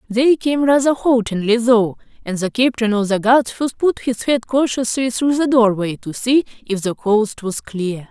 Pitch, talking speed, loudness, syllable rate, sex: 235 Hz, 190 wpm, -17 LUFS, 4.4 syllables/s, female